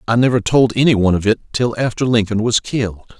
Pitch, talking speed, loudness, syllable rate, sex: 115 Hz, 225 wpm, -16 LUFS, 5.9 syllables/s, male